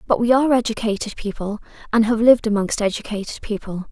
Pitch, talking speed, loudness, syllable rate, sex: 220 Hz, 170 wpm, -20 LUFS, 6.5 syllables/s, female